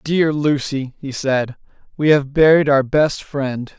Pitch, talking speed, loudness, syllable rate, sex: 140 Hz, 160 wpm, -17 LUFS, 3.7 syllables/s, male